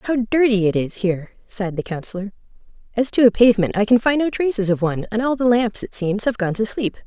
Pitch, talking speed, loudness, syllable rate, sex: 215 Hz, 245 wpm, -19 LUFS, 6.1 syllables/s, female